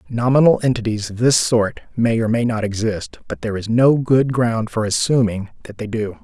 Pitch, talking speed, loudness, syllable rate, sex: 115 Hz, 200 wpm, -18 LUFS, 5.2 syllables/s, male